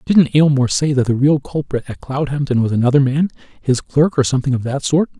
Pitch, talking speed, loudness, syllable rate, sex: 135 Hz, 210 wpm, -16 LUFS, 6.0 syllables/s, male